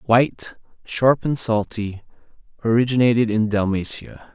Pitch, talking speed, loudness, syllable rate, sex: 115 Hz, 95 wpm, -20 LUFS, 4.4 syllables/s, male